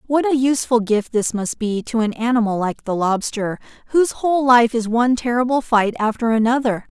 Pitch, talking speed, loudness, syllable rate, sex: 235 Hz, 190 wpm, -18 LUFS, 5.5 syllables/s, female